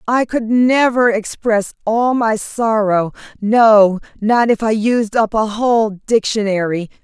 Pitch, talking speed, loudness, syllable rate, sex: 220 Hz, 135 wpm, -15 LUFS, 3.7 syllables/s, female